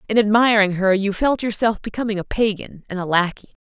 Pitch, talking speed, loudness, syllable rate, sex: 210 Hz, 200 wpm, -19 LUFS, 5.7 syllables/s, female